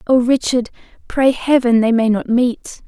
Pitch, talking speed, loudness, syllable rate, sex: 245 Hz, 165 wpm, -15 LUFS, 4.4 syllables/s, female